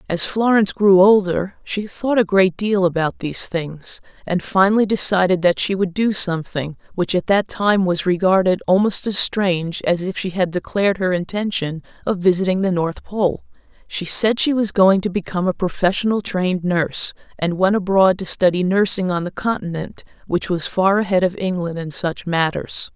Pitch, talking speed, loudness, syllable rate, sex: 185 Hz, 180 wpm, -18 LUFS, 5.0 syllables/s, female